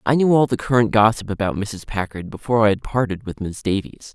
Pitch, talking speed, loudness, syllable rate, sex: 110 Hz, 230 wpm, -20 LUFS, 5.9 syllables/s, male